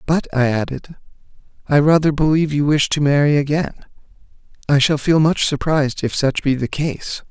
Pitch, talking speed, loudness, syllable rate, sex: 145 Hz, 175 wpm, -17 LUFS, 5.2 syllables/s, male